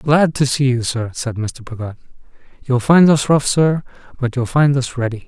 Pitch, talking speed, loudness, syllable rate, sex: 130 Hz, 205 wpm, -17 LUFS, 5.0 syllables/s, male